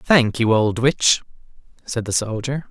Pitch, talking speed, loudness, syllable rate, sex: 120 Hz, 155 wpm, -19 LUFS, 3.9 syllables/s, male